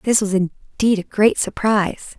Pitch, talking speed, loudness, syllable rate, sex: 205 Hz, 165 wpm, -19 LUFS, 4.4 syllables/s, female